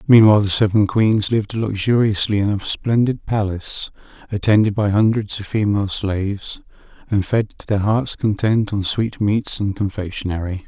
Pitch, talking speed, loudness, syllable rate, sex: 105 Hz, 145 wpm, -19 LUFS, 5.0 syllables/s, male